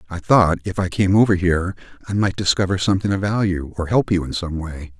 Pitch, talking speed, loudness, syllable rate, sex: 90 Hz, 230 wpm, -19 LUFS, 5.9 syllables/s, male